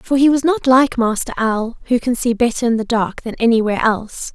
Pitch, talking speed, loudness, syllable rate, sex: 235 Hz, 235 wpm, -16 LUFS, 5.5 syllables/s, female